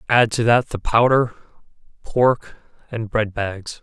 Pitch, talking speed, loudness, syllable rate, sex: 115 Hz, 140 wpm, -19 LUFS, 3.6 syllables/s, male